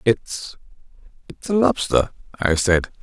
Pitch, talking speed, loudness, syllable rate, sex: 125 Hz, 100 wpm, -21 LUFS, 3.9 syllables/s, male